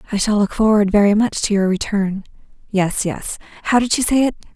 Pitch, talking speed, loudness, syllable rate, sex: 210 Hz, 210 wpm, -17 LUFS, 5.6 syllables/s, female